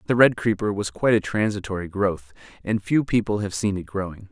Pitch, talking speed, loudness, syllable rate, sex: 100 Hz, 210 wpm, -23 LUFS, 5.7 syllables/s, male